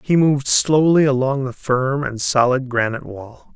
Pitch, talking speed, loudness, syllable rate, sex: 130 Hz, 170 wpm, -17 LUFS, 4.6 syllables/s, male